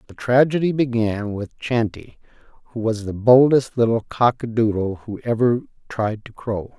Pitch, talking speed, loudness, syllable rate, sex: 115 Hz, 140 wpm, -20 LUFS, 4.6 syllables/s, male